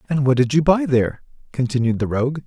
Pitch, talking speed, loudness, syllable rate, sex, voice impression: 135 Hz, 220 wpm, -19 LUFS, 6.5 syllables/s, male, masculine, middle-aged, slightly relaxed, bright, clear, raspy, cool, sincere, calm, friendly, reassuring, slightly lively, kind, modest